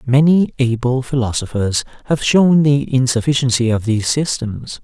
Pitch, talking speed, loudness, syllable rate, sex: 130 Hz, 125 wpm, -16 LUFS, 4.7 syllables/s, male